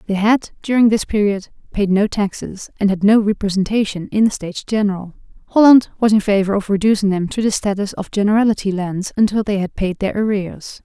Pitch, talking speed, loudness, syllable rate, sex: 205 Hz, 195 wpm, -17 LUFS, 5.8 syllables/s, female